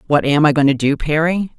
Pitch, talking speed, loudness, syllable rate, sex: 150 Hz, 265 wpm, -15 LUFS, 5.7 syllables/s, female